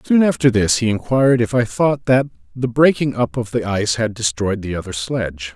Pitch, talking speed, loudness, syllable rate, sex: 115 Hz, 215 wpm, -18 LUFS, 5.4 syllables/s, male